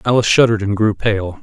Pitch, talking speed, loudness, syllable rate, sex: 105 Hz, 210 wpm, -15 LUFS, 6.8 syllables/s, male